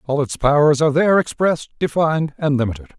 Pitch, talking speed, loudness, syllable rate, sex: 145 Hz, 180 wpm, -18 LUFS, 6.8 syllables/s, male